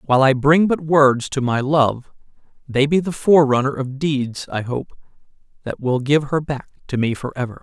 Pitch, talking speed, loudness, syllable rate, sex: 135 Hz, 190 wpm, -18 LUFS, 4.9 syllables/s, male